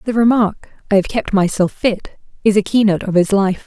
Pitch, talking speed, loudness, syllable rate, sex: 205 Hz, 215 wpm, -16 LUFS, 6.0 syllables/s, female